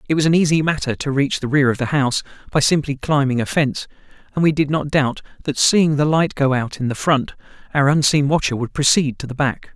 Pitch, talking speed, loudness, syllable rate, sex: 145 Hz, 240 wpm, -18 LUFS, 5.9 syllables/s, male